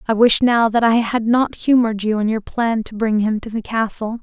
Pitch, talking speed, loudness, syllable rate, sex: 225 Hz, 255 wpm, -17 LUFS, 5.2 syllables/s, female